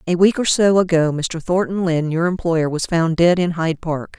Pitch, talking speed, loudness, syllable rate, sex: 170 Hz, 230 wpm, -18 LUFS, 5.2 syllables/s, female